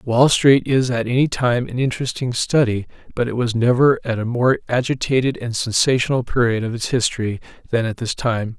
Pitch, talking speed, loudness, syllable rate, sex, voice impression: 120 Hz, 190 wpm, -19 LUFS, 5.3 syllables/s, male, very masculine, slightly old, very thick, relaxed, powerful, slightly dark, slightly soft, slightly muffled, fluent, cool, very intellectual, slightly refreshing, sincere, calm, mature, friendly, reassuring, unique, elegant, wild, sweet, slightly lively, kind, modest